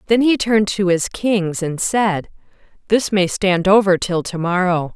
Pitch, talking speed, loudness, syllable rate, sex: 190 Hz, 180 wpm, -17 LUFS, 4.4 syllables/s, female